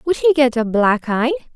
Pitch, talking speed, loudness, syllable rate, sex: 265 Hz, 230 wpm, -17 LUFS, 4.8 syllables/s, female